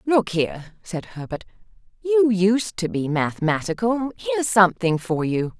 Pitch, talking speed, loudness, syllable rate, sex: 200 Hz, 140 wpm, -22 LUFS, 4.6 syllables/s, female